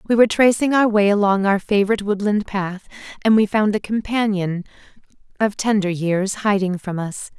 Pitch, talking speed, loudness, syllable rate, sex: 205 Hz, 170 wpm, -19 LUFS, 5.3 syllables/s, female